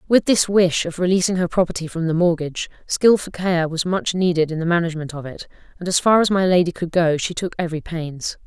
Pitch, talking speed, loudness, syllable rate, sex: 175 Hz, 225 wpm, -19 LUFS, 6.0 syllables/s, female